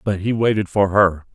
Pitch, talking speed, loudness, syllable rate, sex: 100 Hz, 225 wpm, -18 LUFS, 5.0 syllables/s, male